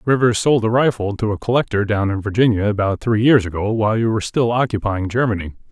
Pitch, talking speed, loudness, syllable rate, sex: 110 Hz, 210 wpm, -18 LUFS, 6.3 syllables/s, male